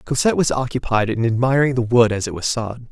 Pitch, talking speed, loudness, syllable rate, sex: 120 Hz, 225 wpm, -19 LUFS, 6.4 syllables/s, male